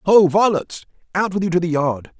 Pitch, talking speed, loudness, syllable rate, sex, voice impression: 175 Hz, 220 wpm, -18 LUFS, 5.3 syllables/s, male, masculine, adult-like, slightly relaxed, powerful, slightly soft, slightly muffled, raspy, cool, intellectual, calm, friendly, reassuring, wild, lively